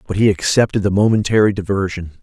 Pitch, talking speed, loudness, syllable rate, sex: 100 Hz, 160 wpm, -16 LUFS, 6.5 syllables/s, male